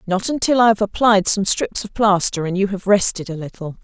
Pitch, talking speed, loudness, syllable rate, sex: 200 Hz, 235 wpm, -17 LUFS, 5.4 syllables/s, female